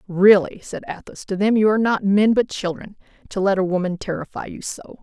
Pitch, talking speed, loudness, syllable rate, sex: 200 Hz, 215 wpm, -20 LUFS, 5.6 syllables/s, female